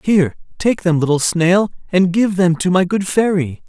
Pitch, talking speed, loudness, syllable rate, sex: 180 Hz, 195 wpm, -16 LUFS, 4.8 syllables/s, male